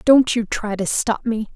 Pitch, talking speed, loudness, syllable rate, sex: 225 Hz, 230 wpm, -20 LUFS, 4.3 syllables/s, female